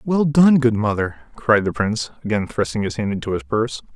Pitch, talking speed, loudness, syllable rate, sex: 110 Hz, 210 wpm, -20 LUFS, 5.8 syllables/s, male